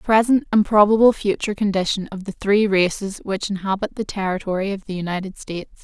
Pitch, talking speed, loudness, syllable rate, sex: 200 Hz, 185 wpm, -20 LUFS, 5.9 syllables/s, female